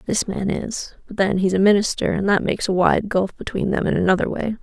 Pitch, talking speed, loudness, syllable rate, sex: 195 Hz, 235 wpm, -20 LUFS, 5.8 syllables/s, female